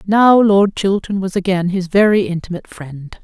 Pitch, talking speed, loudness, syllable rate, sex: 190 Hz, 165 wpm, -14 LUFS, 4.8 syllables/s, female